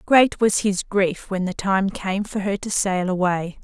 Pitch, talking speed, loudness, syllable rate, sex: 195 Hz, 215 wpm, -21 LUFS, 4.1 syllables/s, female